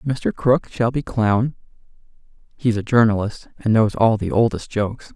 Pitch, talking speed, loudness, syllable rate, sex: 115 Hz, 165 wpm, -20 LUFS, 4.5 syllables/s, male